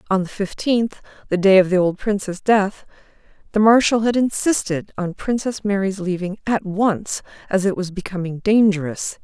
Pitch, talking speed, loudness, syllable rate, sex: 195 Hz, 160 wpm, -19 LUFS, 4.8 syllables/s, female